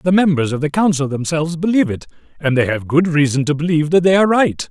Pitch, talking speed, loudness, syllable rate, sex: 160 Hz, 240 wpm, -16 LUFS, 6.7 syllables/s, male